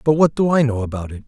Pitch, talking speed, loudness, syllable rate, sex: 130 Hz, 330 wpm, -18 LUFS, 6.8 syllables/s, male